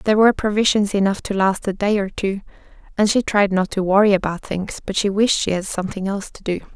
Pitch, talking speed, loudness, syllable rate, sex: 200 Hz, 240 wpm, -19 LUFS, 6.3 syllables/s, female